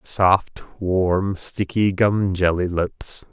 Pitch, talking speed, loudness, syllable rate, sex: 95 Hz, 90 wpm, -20 LUFS, 2.5 syllables/s, male